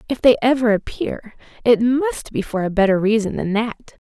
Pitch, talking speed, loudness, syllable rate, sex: 230 Hz, 190 wpm, -19 LUFS, 5.0 syllables/s, female